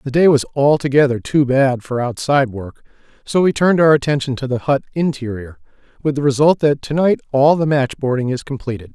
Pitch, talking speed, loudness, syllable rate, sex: 140 Hz, 195 wpm, -16 LUFS, 5.6 syllables/s, male